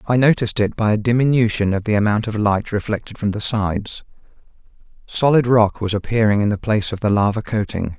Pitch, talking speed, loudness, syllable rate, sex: 110 Hz, 195 wpm, -18 LUFS, 6.1 syllables/s, male